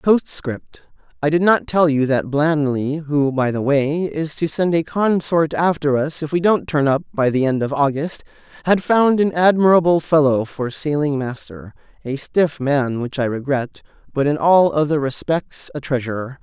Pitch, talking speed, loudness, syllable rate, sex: 150 Hz, 175 wpm, -18 LUFS, 4.5 syllables/s, male